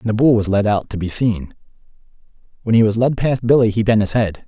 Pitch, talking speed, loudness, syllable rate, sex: 110 Hz, 255 wpm, -17 LUFS, 6.0 syllables/s, male